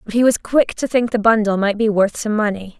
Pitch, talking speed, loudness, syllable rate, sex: 215 Hz, 280 wpm, -17 LUFS, 5.6 syllables/s, female